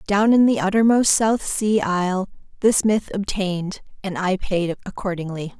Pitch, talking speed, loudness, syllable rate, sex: 195 Hz, 150 wpm, -20 LUFS, 4.6 syllables/s, female